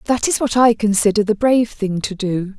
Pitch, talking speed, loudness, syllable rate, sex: 215 Hz, 230 wpm, -17 LUFS, 5.4 syllables/s, female